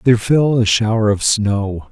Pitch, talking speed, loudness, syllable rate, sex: 110 Hz, 190 wpm, -15 LUFS, 4.5 syllables/s, male